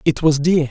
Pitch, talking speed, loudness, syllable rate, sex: 155 Hz, 255 wpm, -16 LUFS, 5.1 syllables/s, male